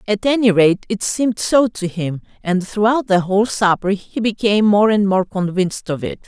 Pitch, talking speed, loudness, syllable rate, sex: 200 Hz, 200 wpm, -17 LUFS, 5.1 syllables/s, female